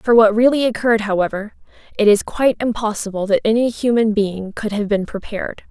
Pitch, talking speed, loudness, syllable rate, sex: 215 Hz, 180 wpm, -17 LUFS, 5.9 syllables/s, female